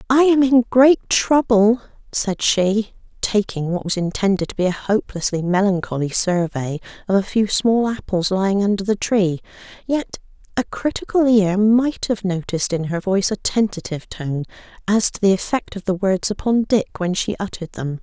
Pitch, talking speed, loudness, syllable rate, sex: 205 Hz, 175 wpm, -19 LUFS, 5.0 syllables/s, female